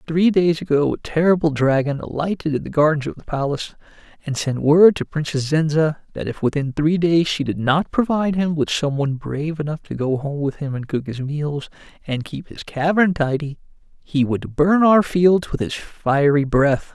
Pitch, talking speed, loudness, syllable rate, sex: 150 Hz, 200 wpm, -19 LUFS, 5.0 syllables/s, male